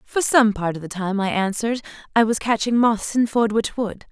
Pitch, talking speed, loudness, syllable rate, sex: 220 Hz, 220 wpm, -20 LUFS, 5.3 syllables/s, female